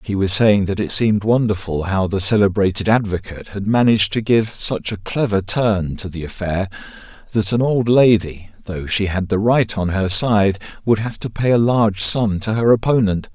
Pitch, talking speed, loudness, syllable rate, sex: 105 Hz, 200 wpm, -17 LUFS, 5.0 syllables/s, male